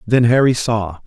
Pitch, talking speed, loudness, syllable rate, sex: 115 Hz, 170 wpm, -15 LUFS, 4.4 syllables/s, male